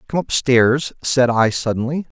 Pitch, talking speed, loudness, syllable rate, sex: 130 Hz, 135 wpm, -17 LUFS, 4.4 syllables/s, male